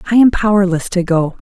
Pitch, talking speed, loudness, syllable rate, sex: 190 Hz, 205 wpm, -14 LUFS, 6.0 syllables/s, female